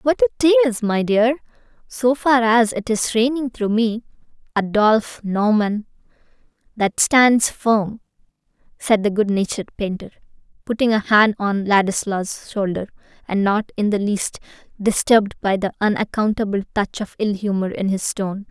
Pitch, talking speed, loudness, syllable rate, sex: 215 Hz, 140 wpm, -19 LUFS, 4.5 syllables/s, female